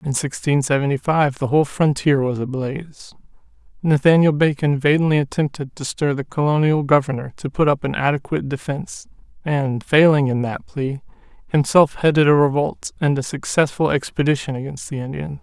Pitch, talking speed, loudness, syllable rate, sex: 145 Hz, 155 wpm, -19 LUFS, 5.3 syllables/s, male